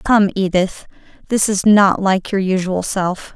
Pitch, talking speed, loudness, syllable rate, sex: 195 Hz, 160 wpm, -16 LUFS, 3.9 syllables/s, female